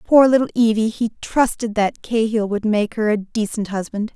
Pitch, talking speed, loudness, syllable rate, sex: 220 Hz, 190 wpm, -19 LUFS, 4.9 syllables/s, female